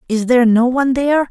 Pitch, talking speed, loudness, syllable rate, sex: 250 Hz, 230 wpm, -14 LUFS, 7.1 syllables/s, female